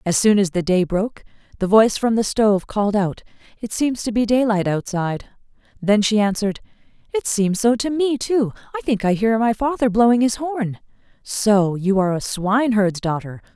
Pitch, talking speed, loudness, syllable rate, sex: 215 Hz, 190 wpm, -19 LUFS, 5.3 syllables/s, female